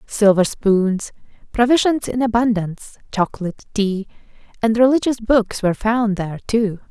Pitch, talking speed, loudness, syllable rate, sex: 220 Hz, 120 wpm, -18 LUFS, 4.9 syllables/s, female